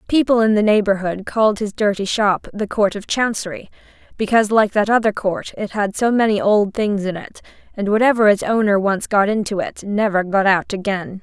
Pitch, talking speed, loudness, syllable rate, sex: 205 Hz, 200 wpm, -18 LUFS, 5.3 syllables/s, female